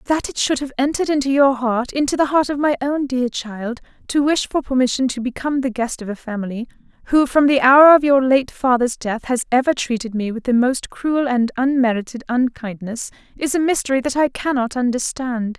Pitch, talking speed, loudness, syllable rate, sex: 260 Hz, 210 wpm, -18 LUFS, 5.5 syllables/s, female